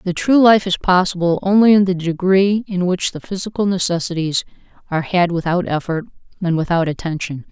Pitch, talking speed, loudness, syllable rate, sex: 180 Hz, 170 wpm, -17 LUFS, 5.5 syllables/s, female